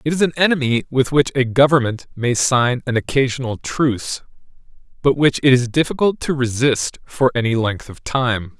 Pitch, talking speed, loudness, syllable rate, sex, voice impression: 130 Hz, 175 wpm, -18 LUFS, 5.0 syllables/s, male, masculine, adult-like, slightly thick, cool, slightly intellectual, slightly friendly